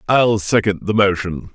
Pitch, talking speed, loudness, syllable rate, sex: 100 Hz, 155 wpm, -17 LUFS, 4.5 syllables/s, male